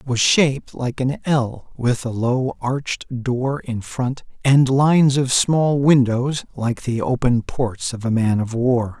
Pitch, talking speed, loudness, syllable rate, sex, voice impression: 125 Hz, 180 wpm, -19 LUFS, 3.8 syllables/s, male, masculine, slightly young, slightly adult-like, slightly thick, slightly relaxed, slightly powerful, slightly bright, slightly soft, clear, fluent, slightly cool, intellectual, slightly refreshing, very sincere, very calm, slightly mature, friendly, reassuring, slightly unique, slightly wild, slightly sweet, kind, very modest